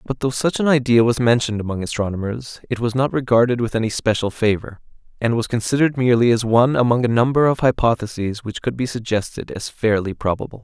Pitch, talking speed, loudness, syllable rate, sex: 120 Hz, 195 wpm, -19 LUFS, 6.3 syllables/s, male